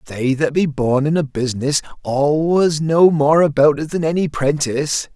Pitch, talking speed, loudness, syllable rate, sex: 150 Hz, 175 wpm, -17 LUFS, 4.7 syllables/s, male